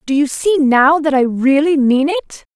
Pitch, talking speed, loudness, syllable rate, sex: 290 Hz, 210 wpm, -14 LUFS, 4.3 syllables/s, female